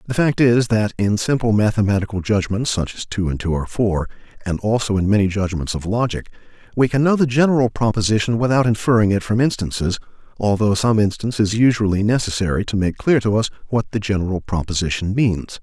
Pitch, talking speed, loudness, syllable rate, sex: 105 Hz, 190 wpm, -19 LUFS, 6.1 syllables/s, male